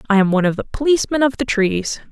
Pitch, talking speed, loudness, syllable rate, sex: 230 Hz, 255 wpm, -17 LUFS, 7.1 syllables/s, female